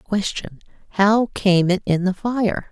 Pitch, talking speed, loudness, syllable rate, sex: 195 Hz, 155 wpm, -19 LUFS, 3.6 syllables/s, female